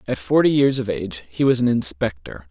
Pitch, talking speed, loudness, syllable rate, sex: 105 Hz, 215 wpm, -19 LUFS, 5.6 syllables/s, male